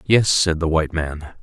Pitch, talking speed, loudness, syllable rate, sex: 85 Hz, 210 wpm, -19 LUFS, 4.8 syllables/s, male